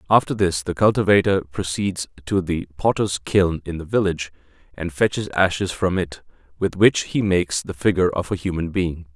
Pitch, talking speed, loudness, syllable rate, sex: 90 Hz, 175 wpm, -21 LUFS, 5.3 syllables/s, male